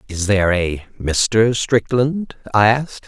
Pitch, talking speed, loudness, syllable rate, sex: 110 Hz, 135 wpm, -17 LUFS, 3.9 syllables/s, male